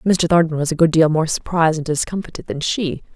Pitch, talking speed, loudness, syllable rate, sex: 160 Hz, 230 wpm, -18 LUFS, 6.0 syllables/s, female